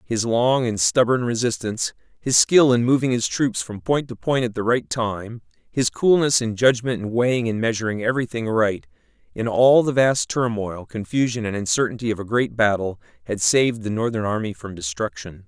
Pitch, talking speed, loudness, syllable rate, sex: 115 Hz, 185 wpm, -21 LUFS, 5.2 syllables/s, male